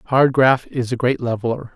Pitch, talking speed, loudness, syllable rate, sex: 125 Hz, 205 wpm, -18 LUFS, 5.2 syllables/s, male